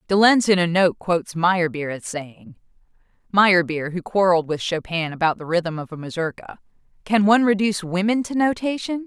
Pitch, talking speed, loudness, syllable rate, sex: 185 Hz, 160 wpm, -20 LUFS, 5.3 syllables/s, female